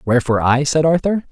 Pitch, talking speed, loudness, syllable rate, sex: 140 Hz, 180 wpm, -16 LUFS, 6.9 syllables/s, male